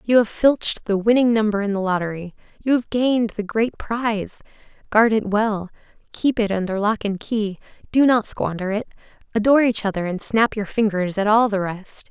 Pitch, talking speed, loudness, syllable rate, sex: 215 Hz, 195 wpm, -20 LUFS, 5.2 syllables/s, female